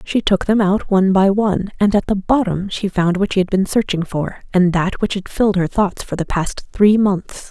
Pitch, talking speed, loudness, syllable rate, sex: 195 Hz, 250 wpm, -17 LUFS, 5.0 syllables/s, female